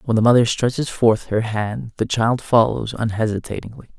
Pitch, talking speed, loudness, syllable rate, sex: 115 Hz, 165 wpm, -19 LUFS, 5.2 syllables/s, male